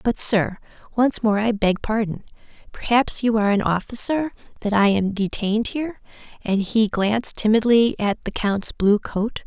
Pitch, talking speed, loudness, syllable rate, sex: 215 Hz, 165 wpm, -21 LUFS, 4.7 syllables/s, female